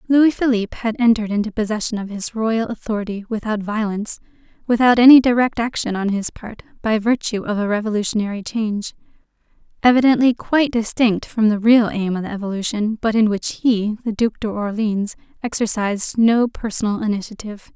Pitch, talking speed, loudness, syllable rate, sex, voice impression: 220 Hz, 155 wpm, -19 LUFS, 5.6 syllables/s, female, feminine, adult-like, tensed, slightly weak, soft, clear, intellectual, calm, friendly, reassuring, elegant, kind, slightly modest